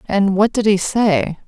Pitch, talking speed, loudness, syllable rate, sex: 205 Hz, 205 wpm, -16 LUFS, 4.0 syllables/s, female